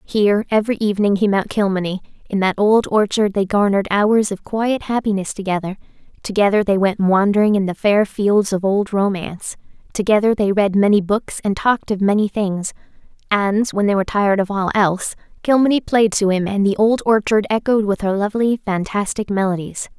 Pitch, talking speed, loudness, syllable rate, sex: 205 Hz, 180 wpm, -17 LUFS, 5.5 syllables/s, female